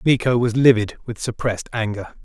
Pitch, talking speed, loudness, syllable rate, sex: 115 Hz, 160 wpm, -20 LUFS, 5.7 syllables/s, male